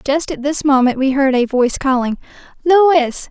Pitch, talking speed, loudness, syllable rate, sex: 280 Hz, 180 wpm, -15 LUFS, 4.8 syllables/s, female